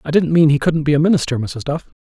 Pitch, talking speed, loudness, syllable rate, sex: 150 Hz, 295 wpm, -16 LUFS, 6.7 syllables/s, male